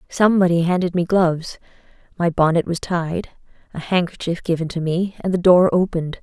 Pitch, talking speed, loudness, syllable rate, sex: 175 Hz, 165 wpm, -19 LUFS, 5.5 syllables/s, female